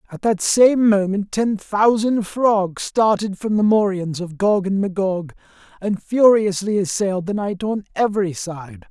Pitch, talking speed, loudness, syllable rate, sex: 200 Hz, 155 wpm, -19 LUFS, 4.2 syllables/s, male